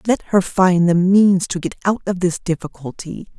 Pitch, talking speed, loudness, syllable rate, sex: 180 Hz, 195 wpm, -17 LUFS, 4.7 syllables/s, female